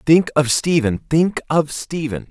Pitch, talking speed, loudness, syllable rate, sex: 150 Hz, 155 wpm, -18 LUFS, 3.8 syllables/s, male